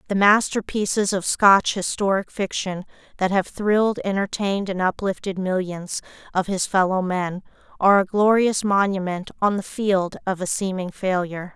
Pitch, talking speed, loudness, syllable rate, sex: 195 Hz, 145 wpm, -21 LUFS, 4.8 syllables/s, female